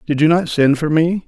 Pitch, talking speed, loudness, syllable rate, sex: 160 Hz, 285 wpm, -15 LUFS, 5.2 syllables/s, male